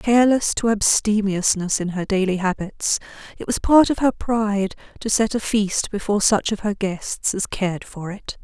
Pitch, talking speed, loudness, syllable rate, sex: 205 Hz, 185 wpm, -20 LUFS, 4.8 syllables/s, female